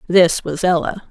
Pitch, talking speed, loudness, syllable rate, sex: 175 Hz, 165 wpm, -17 LUFS, 4.3 syllables/s, female